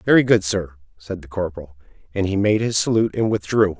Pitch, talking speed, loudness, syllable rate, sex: 95 Hz, 205 wpm, -20 LUFS, 6.0 syllables/s, male